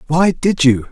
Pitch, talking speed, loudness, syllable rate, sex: 155 Hz, 195 wpm, -14 LUFS, 4.2 syllables/s, male